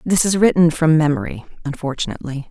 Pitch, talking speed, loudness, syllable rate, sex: 155 Hz, 145 wpm, -17 LUFS, 6.3 syllables/s, female